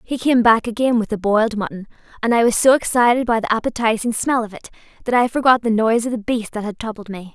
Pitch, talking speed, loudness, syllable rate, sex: 230 Hz, 255 wpm, -18 LUFS, 6.4 syllables/s, female